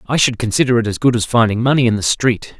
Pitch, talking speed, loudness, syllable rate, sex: 115 Hz, 275 wpm, -15 LUFS, 6.5 syllables/s, male